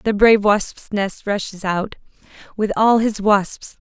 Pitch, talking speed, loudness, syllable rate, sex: 205 Hz, 155 wpm, -18 LUFS, 3.9 syllables/s, female